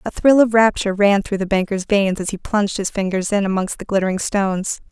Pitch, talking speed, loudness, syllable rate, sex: 200 Hz, 230 wpm, -18 LUFS, 5.9 syllables/s, female